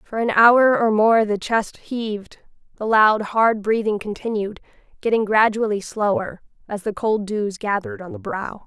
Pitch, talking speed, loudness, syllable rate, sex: 215 Hz, 165 wpm, -20 LUFS, 4.5 syllables/s, female